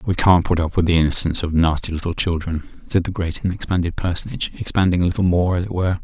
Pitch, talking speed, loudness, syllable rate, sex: 90 Hz, 240 wpm, -20 LUFS, 6.9 syllables/s, male